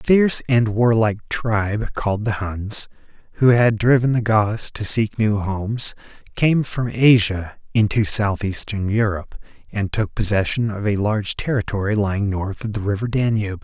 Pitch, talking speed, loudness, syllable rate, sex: 110 Hz, 160 wpm, -20 LUFS, 4.8 syllables/s, male